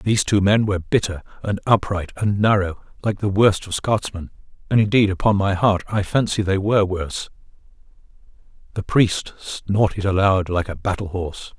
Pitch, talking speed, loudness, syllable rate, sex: 100 Hz, 165 wpm, -20 LUFS, 5.4 syllables/s, male